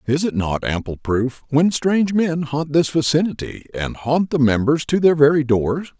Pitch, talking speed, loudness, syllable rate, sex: 145 Hz, 190 wpm, -19 LUFS, 4.7 syllables/s, male